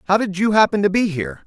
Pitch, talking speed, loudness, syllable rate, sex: 190 Hz, 285 wpm, -18 LUFS, 7.0 syllables/s, male